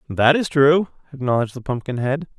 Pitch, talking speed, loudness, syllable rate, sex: 140 Hz, 150 wpm, -19 LUFS, 5.8 syllables/s, male